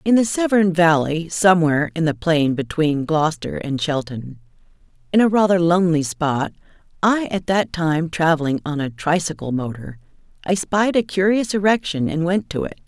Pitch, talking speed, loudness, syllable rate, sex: 165 Hz, 165 wpm, -19 LUFS, 5.1 syllables/s, female